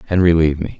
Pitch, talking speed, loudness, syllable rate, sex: 80 Hz, 225 wpm, -15 LUFS, 8.2 syllables/s, male